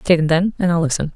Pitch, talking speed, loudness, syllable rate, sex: 170 Hz, 310 wpm, -17 LUFS, 7.4 syllables/s, female